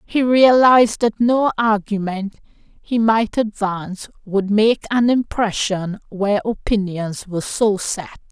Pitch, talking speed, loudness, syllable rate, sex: 210 Hz, 125 wpm, -18 LUFS, 3.9 syllables/s, female